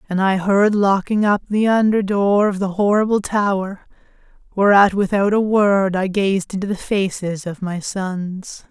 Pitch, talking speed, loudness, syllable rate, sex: 195 Hz, 165 wpm, -18 LUFS, 4.3 syllables/s, female